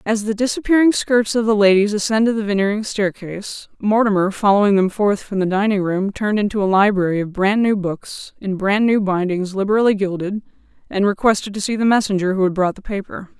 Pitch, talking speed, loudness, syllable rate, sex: 205 Hz, 195 wpm, -18 LUFS, 5.8 syllables/s, female